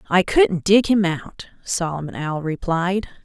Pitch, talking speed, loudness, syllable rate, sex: 180 Hz, 150 wpm, -20 LUFS, 4.0 syllables/s, female